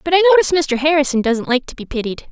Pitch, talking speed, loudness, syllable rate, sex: 295 Hz, 260 wpm, -16 LUFS, 8.1 syllables/s, female